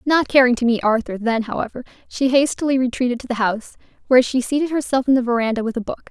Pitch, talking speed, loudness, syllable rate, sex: 250 Hz, 225 wpm, -19 LUFS, 6.9 syllables/s, female